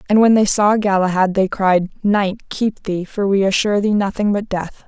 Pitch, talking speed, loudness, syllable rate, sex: 200 Hz, 210 wpm, -17 LUFS, 4.9 syllables/s, female